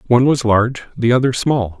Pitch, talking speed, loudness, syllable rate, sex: 120 Hz, 200 wpm, -16 LUFS, 6.2 syllables/s, male